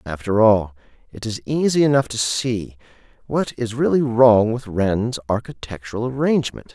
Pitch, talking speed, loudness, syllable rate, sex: 115 Hz, 140 wpm, -19 LUFS, 4.7 syllables/s, male